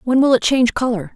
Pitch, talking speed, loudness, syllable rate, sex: 240 Hz, 260 wpm, -16 LUFS, 6.7 syllables/s, female